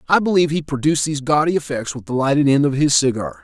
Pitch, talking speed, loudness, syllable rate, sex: 145 Hz, 245 wpm, -18 LUFS, 7.1 syllables/s, male